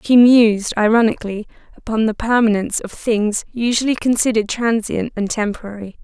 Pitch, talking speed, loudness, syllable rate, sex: 220 Hz, 130 wpm, -17 LUFS, 5.6 syllables/s, female